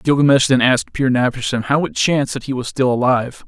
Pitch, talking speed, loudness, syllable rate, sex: 130 Hz, 260 wpm, -16 LUFS, 6.7 syllables/s, male